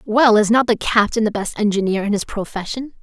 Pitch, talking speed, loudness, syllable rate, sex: 215 Hz, 220 wpm, -18 LUFS, 5.6 syllables/s, female